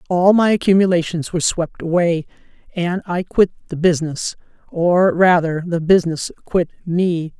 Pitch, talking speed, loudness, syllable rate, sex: 175 Hz, 130 wpm, -17 LUFS, 4.8 syllables/s, female